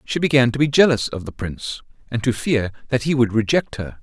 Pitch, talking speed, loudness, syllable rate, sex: 125 Hz, 240 wpm, -20 LUFS, 5.8 syllables/s, male